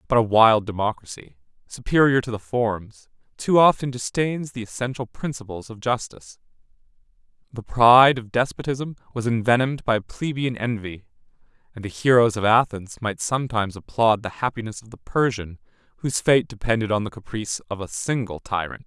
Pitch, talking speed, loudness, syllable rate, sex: 115 Hz, 155 wpm, -22 LUFS, 5.4 syllables/s, male